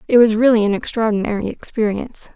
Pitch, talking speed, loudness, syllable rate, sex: 220 Hz, 155 wpm, -17 LUFS, 6.5 syllables/s, female